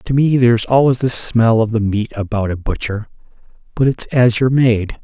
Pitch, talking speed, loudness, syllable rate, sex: 120 Hz, 205 wpm, -15 LUFS, 5.1 syllables/s, male